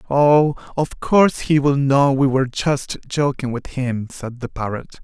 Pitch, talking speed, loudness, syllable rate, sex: 135 Hz, 180 wpm, -19 LUFS, 4.2 syllables/s, male